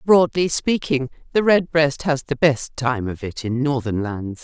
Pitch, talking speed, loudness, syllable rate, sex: 140 Hz, 175 wpm, -20 LUFS, 4.2 syllables/s, female